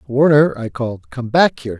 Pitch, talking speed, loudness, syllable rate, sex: 125 Hz, 200 wpm, -16 LUFS, 5.6 syllables/s, male